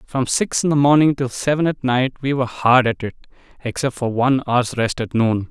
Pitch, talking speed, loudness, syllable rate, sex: 130 Hz, 230 wpm, -18 LUFS, 5.5 syllables/s, male